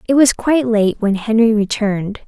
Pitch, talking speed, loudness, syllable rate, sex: 220 Hz, 185 wpm, -15 LUFS, 5.5 syllables/s, female